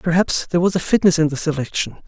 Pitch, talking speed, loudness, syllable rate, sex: 165 Hz, 230 wpm, -18 LUFS, 6.4 syllables/s, male